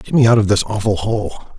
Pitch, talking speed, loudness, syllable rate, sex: 110 Hz, 265 wpm, -16 LUFS, 6.0 syllables/s, male